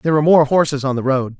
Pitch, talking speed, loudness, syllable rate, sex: 145 Hz, 300 wpm, -15 LUFS, 7.4 syllables/s, male